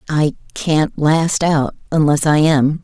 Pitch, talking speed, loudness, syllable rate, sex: 150 Hz, 150 wpm, -16 LUFS, 3.5 syllables/s, female